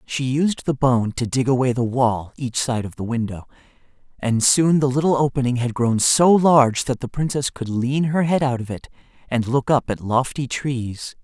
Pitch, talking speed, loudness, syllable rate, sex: 130 Hz, 210 wpm, -20 LUFS, 4.8 syllables/s, male